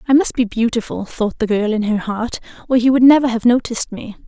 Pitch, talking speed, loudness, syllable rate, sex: 230 Hz, 240 wpm, -16 LUFS, 5.9 syllables/s, female